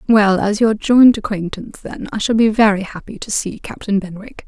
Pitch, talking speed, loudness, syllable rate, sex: 210 Hz, 200 wpm, -16 LUFS, 5.2 syllables/s, female